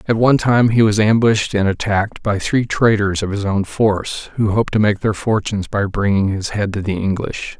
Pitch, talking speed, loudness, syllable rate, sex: 105 Hz, 220 wpm, -17 LUFS, 5.5 syllables/s, male